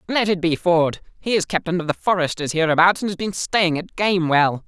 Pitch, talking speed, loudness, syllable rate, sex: 175 Hz, 220 wpm, -20 LUFS, 5.6 syllables/s, male